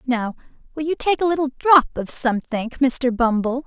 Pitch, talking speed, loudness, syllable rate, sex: 265 Hz, 180 wpm, -19 LUFS, 5.0 syllables/s, female